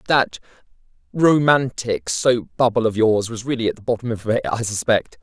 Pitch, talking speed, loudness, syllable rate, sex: 115 Hz, 170 wpm, -20 LUFS, 4.9 syllables/s, male